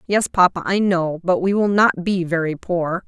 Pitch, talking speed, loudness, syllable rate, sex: 180 Hz, 215 wpm, -19 LUFS, 4.6 syllables/s, female